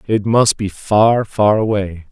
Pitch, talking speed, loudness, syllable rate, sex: 105 Hz, 170 wpm, -15 LUFS, 3.6 syllables/s, male